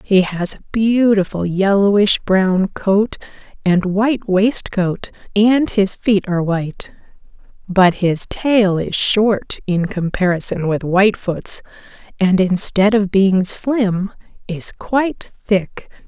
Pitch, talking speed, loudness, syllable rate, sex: 195 Hz, 120 wpm, -16 LUFS, 3.6 syllables/s, female